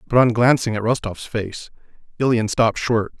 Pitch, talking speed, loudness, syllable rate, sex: 115 Hz, 170 wpm, -19 LUFS, 5.6 syllables/s, male